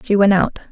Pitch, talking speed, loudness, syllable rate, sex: 195 Hz, 250 wpm, -15 LUFS, 5.8 syllables/s, female